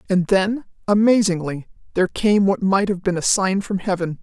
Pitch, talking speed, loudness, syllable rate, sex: 190 Hz, 185 wpm, -19 LUFS, 5.1 syllables/s, female